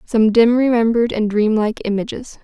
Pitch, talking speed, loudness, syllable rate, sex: 225 Hz, 175 wpm, -16 LUFS, 5.2 syllables/s, female